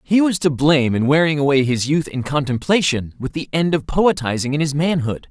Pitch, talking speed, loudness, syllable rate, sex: 145 Hz, 215 wpm, -18 LUFS, 5.5 syllables/s, male